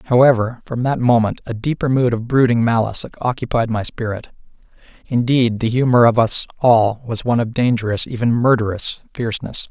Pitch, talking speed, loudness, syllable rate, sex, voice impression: 120 Hz, 160 wpm, -17 LUFS, 5.5 syllables/s, male, very masculine, adult-like, thick, slightly relaxed, slightly weak, slightly dark, soft, slightly muffled, fluent, slightly raspy, cool, very intellectual, slightly refreshing, very sincere, very calm, slightly mature, friendly, reassuring, slightly unique, elegant, slightly wild, sweet, kind, modest